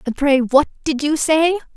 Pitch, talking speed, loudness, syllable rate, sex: 290 Hz, 205 wpm, -17 LUFS, 4.6 syllables/s, female